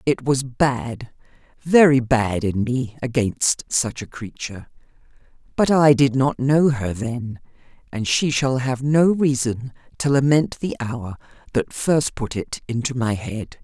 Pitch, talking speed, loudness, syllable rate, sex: 130 Hz, 155 wpm, -20 LUFS, 3.9 syllables/s, female